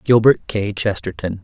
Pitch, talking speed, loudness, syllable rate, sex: 105 Hz, 125 wpm, -18 LUFS, 4.7 syllables/s, male